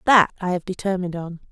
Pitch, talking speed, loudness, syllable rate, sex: 185 Hz, 200 wpm, -22 LUFS, 6.5 syllables/s, female